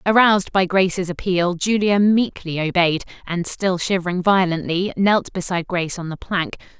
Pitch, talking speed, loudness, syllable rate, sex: 185 Hz, 150 wpm, -19 LUFS, 5.0 syllables/s, female